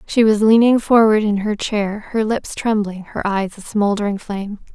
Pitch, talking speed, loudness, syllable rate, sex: 210 Hz, 190 wpm, -17 LUFS, 4.7 syllables/s, female